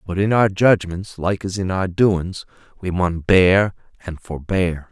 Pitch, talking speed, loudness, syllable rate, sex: 90 Hz, 170 wpm, -19 LUFS, 3.9 syllables/s, male